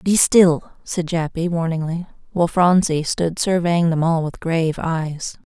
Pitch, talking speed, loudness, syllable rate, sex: 165 Hz, 155 wpm, -19 LUFS, 4.2 syllables/s, female